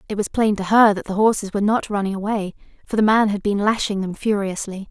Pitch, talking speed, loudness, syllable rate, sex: 205 Hz, 245 wpm, -20 LUFS, 6.2 syllables/s, female